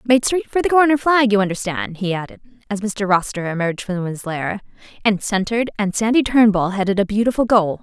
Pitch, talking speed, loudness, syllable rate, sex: 210 Hz, 200 wpm, -18 LUFS, 5.8 syllables/s, female